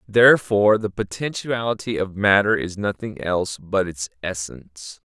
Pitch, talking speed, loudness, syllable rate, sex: 100 Hz, 130 wpm, -21 LUFS, 4.9 syllables/s, male